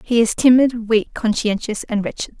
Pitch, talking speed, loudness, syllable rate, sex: 225 Hz, 175 wpm, -18 LUFS, 4.9 syllables/s, female